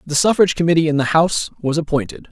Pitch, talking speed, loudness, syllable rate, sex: 155 Hz, 205 wpm, -17 LUFS, 7.1 syllables/s, male